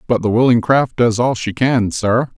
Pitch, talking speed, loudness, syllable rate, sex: 115 Hz, 225 wpm, -15 LUFS, 4.6 syllables/s, male